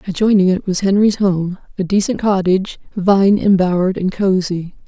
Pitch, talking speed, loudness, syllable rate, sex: 190 Hz, 135 wpm, -15 LUFS, 5.1 syllables/s, female